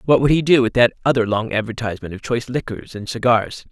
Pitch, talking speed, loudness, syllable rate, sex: 120 Hz, 225 wpm, -19 LUFS, 6.5 syllables/s, male